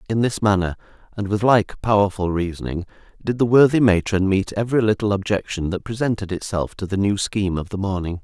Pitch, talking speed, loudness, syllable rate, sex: 100 Hz, 190 wpm, -20 LUFS, 5.9 syllables/s, male